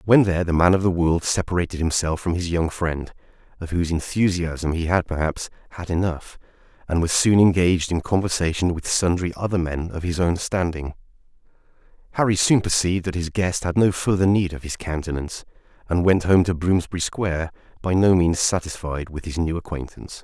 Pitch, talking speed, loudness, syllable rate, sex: 85 Hz, 185 wpm, -22 LUFS, 5.6 syllables/s, male